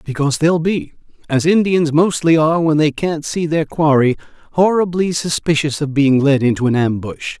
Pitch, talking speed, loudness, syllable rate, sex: 155 Hz, 170 wpm, -16 LUFS, 5.1 syllables/s, male